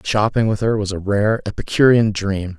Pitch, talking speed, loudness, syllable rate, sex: 105 Hz, 185 wpm, -18 LUFS, 4.9 syllables/s, male